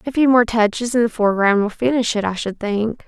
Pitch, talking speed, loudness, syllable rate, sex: 225 Hz, 255 wpm, -18 LUFS, 5.8 syllables/s, female